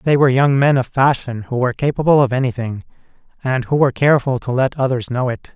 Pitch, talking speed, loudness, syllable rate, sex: 130 Hz, 215 wpm, -17 LUFS, 6.4 syllables/s, male